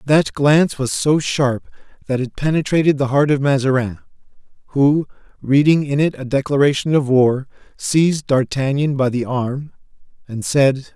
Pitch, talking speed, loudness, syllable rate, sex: 140 Hz, 150 wpm, -17 LUFS, 4.7 syllables/s, male